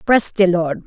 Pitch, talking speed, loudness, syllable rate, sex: 190 Hz, 210 wpm, -16 LUFS, 4.0 syllables/s, female